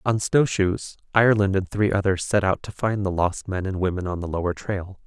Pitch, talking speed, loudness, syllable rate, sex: 95 Hz, 225 wpm, -23 LUFS, 5.2 syllables/s, male